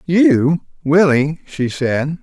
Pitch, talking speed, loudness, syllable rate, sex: 150 Hz, 110 wpm, -16 LUFS, 2.7 syllables/s, male